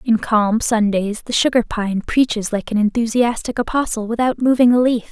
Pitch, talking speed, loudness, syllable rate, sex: 230 Hz, 190 wpm, -17 LUFS, 5.1 syllables/s, female